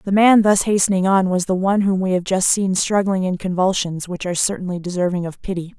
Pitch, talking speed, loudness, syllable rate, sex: 190 Hz, 230 wpm, -18 LUFS, 6.0 syllables/s, female